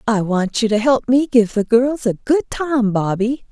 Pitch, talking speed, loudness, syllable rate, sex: 235 Hz, 220 wpm, -17 LUFS, 4.4 syllables/s, female